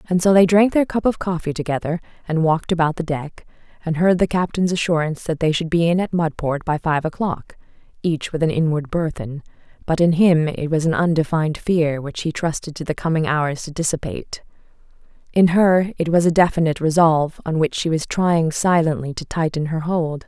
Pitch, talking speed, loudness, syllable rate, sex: 165 Hz, 200 wpm, -19 LUFS, 5.6 syllables/s, female